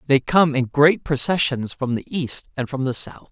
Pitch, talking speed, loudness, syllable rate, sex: 140 Hz, 215 wpm, -20 LUFS, 4.6 syllables/s, male